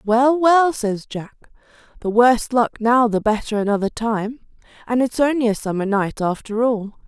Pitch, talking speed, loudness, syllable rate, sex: 230 Hz, 170 wpm, -19 LUFS, 4.7 syllables/s, female